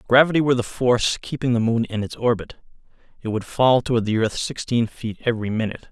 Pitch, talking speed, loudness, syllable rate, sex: 120 Hz, 215 wpm, -21 LUFS, 6.3 syllables/s, male